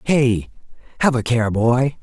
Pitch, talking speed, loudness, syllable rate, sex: 125 Hz, 150 wpm, -18 LUFS, 3.7 syllables/s, male